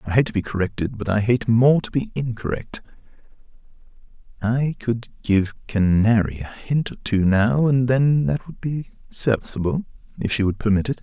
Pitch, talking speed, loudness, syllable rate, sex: 115 Hz, 175 wpm, -21 LUFS, 4.9 syllables/s, male